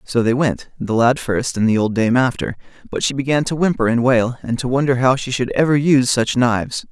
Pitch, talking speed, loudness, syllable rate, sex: 125 Hz, 245 wpm, -17 LUFS, 5.5 syllables/s, male